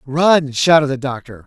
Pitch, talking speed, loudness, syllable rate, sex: 140 Hz, 165 wpm, -15 LUFS, 4.4 syllables/s, male